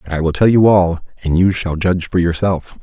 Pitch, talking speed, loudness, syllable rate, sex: 90 Hz, 255 wpm, -15 LUFS, 5.6 syllables/s, male